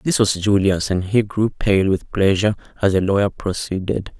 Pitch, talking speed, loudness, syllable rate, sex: 100 Hz, 185 wpm, -19 LUFS, 5.0 syllables/s, male